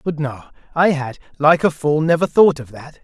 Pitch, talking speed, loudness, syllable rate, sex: 150 Hz, 215 wpm, -17 LUFS, 5.0 syllables/s, male